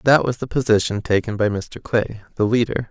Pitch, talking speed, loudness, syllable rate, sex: 110 Hz, 205 wpm, -20 LUFS, 5.3 syllables/s, male